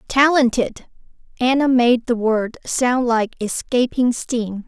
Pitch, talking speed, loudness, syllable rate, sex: 240 Hz, 115 wpm, -18 LUFS, 3.6 syllables/s, female